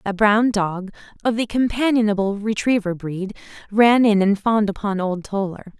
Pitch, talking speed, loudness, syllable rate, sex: 210 Hz, 155 wpm, -20 LUFS, 4.8 syllables/s, female